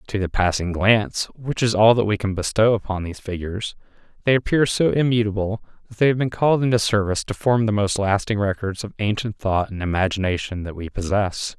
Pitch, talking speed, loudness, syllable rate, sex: 105 Hz, 200 wpm, -21 LUFS, 5.9 syllables/s, male